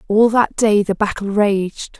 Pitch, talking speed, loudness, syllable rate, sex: 205 Hz, 180 wpm, -16 LUFS, 3.9 syllables/s, female